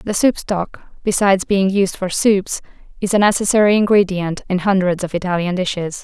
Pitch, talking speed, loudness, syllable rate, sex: 190 Hz, 170 wpm, -17 LUFS, 5.3 syllables/s, female